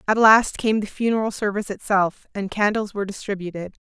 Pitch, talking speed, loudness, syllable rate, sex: 205 Hz, 170 wpm, -21 LUFS, 5.9 syllables/s, female